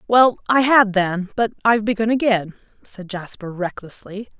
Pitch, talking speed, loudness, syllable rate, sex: 210 Hz, 150 wpm, -19 LUFS, 4.8 syllables/s, female